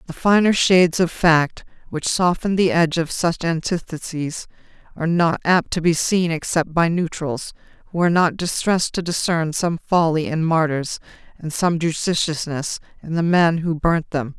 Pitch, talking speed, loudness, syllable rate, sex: 165 Hz, 165 wpm, -19 LUFS, 4.8 syllables/s, female